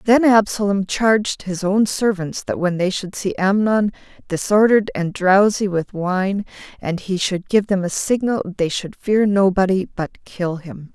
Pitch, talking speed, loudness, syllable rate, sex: 195 Hz, 170 wpm, -19 LUFS, 4.3 syllables/s, female